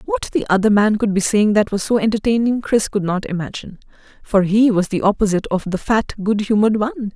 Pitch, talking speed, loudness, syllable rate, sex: 215 Hz, 220 wpm, -17 LUFS, 6.1 syllables/s, female